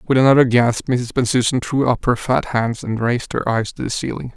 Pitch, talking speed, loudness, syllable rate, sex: 125 Hz, 235 wpm, -18 LUFS, 5.4 syllables/s, male